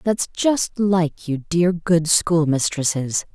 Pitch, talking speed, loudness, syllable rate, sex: 170 Hz, 125 wpm, -20 LUFS, 3.2 syllables/s, female